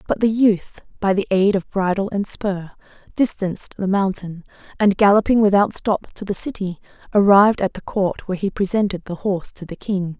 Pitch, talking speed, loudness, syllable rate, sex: 195 Hz, 190 wpm, -19 LUFS, 5.3 syllables/s, female